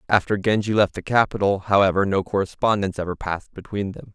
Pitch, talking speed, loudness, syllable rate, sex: 100 Hz, 175 wpm, -22 LUFS, 6.3 syllables/s, male